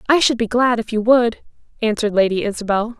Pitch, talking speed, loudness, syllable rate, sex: 225 Hz, 200 wpm, -18 LUFS, 6.2 syllables/s, female